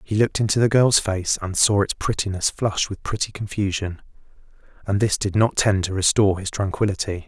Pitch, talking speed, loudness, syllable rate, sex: 100 Hz, 190 wpm, -21 LUFS, 5.5 syllables/s, male